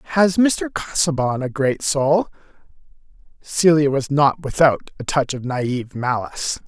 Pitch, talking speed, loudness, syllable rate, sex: 145 Hz, 135 wpm, -19 LUFS, 4.3 syllables/s, male